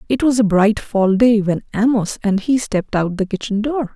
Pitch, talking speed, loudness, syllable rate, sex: 215 Hz, 230 wpm, -17 LUFS, 5.0 syllables/s, female